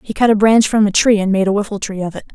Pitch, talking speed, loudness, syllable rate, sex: 205 Hz, 360 wpm, -14 LUFS, 6.9 syllables/s, female